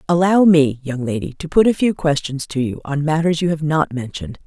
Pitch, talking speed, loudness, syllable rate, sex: 155 Hz, 230 wpm, -18 LUFS, 5.5 syllables/s, female